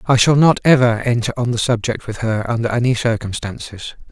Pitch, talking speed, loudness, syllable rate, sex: 120 Hz, 190 wpm, -17 LUFS, 5.5 syllables/s, male